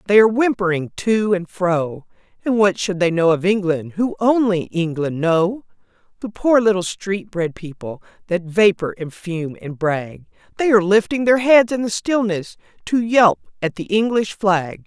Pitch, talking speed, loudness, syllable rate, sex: 195 Hz, 175 wpm, -18 LUFS, 4.5 syllables/s, female